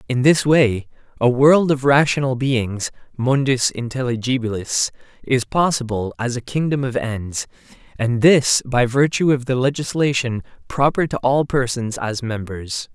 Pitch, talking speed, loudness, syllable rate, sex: 125 Hz, 140 wpm, -19 LUFS, 3.9 syllables/s, male